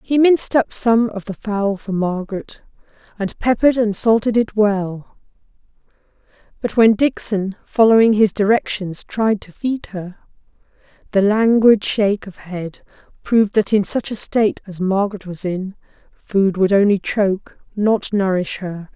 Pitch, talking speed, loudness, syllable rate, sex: 205 Hz, 150 wpm, -18 LUFS, 4.5 syllables/s, female